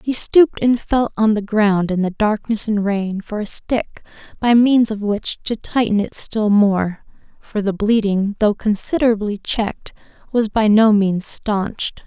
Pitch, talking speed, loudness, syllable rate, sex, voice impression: 210 Hz, 175 wpm, -18 LUFS, 4.2 syllables/s, female, very feminine, slightly young, very thin, slightly tensed, weak, dark, soft, clear, slightly fluent, very cute, intellectual, refreshing, sincere, calm, very friendly, reassuring, very unique, very elegant, slightly wild, very sweet, lively, kind, sharp, slightly modest, light